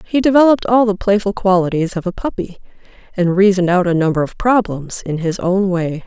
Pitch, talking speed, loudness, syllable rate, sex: 190 Hz, 200 wpm, -15 LUFS, 5.9 syllables/s, female